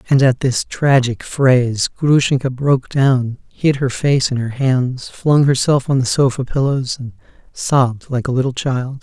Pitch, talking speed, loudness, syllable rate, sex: 130 Hz, 175 wpm, -16 LUFS, 4.3 syllables/s, male